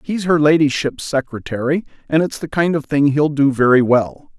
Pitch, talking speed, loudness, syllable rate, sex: 145 Hz, 190 wpm, -17 LUFS, 5.0 syllables/s, male